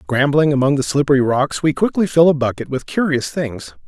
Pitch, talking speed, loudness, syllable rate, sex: 140 Hz, 200 wpm, -17 LUFS, 5.5 syllables/s, male